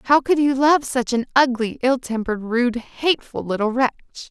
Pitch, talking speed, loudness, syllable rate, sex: 250 Hz, 180 wpm, -20 LUFS, 5.4 syllables/s, female